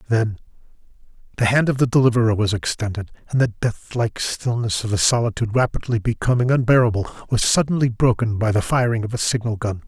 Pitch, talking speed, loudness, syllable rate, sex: 115 Hz, 175 wpm, -20 LUFS, 6.1 syllables/s, male